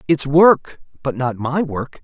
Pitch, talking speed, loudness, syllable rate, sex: 145 Hz, 150 wpm, -17 LUFS, 3.6 syllables/s, male